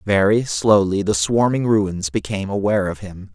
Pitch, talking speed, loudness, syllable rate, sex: 100 Hz, 160 wpm, -18 LUFS, 5.0 syllables/s, male